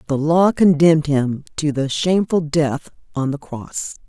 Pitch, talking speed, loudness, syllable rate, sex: 150 Hz, 160 wpm, -18 LUFS, 4.4 syllables/s, female